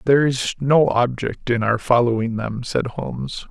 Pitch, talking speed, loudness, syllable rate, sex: 120 Hz, 170 wpm, -20 LUFS, 4.5 syllables/s, male